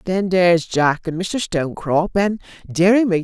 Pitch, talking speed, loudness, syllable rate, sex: 180 Hz, 165 wpm, -18 LUFS, 4.6 syllables/s, male